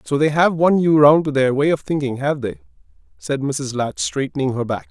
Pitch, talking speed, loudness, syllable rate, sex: 145 Hz, 230 wpm, -18 LUFS, 5.3 syllables/s, male